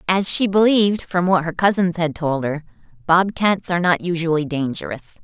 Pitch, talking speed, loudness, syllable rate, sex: 175 Hz, 170 wpm, -18 LUFS, 5.2 syllables/s, female